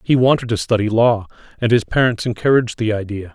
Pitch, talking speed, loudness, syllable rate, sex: 110 Hz, 195 wpm, -17 LUFS, 6.1 syllables/s, male